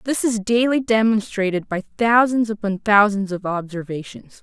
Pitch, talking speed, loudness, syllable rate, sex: 210 Hz, 135 wpm, -19 LUFS, 4.6 syllables/s, female